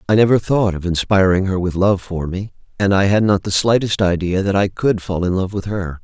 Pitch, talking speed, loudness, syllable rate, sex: 95 Hz, 250 wpm, -17 LUFS, 5.4 syllables/s, male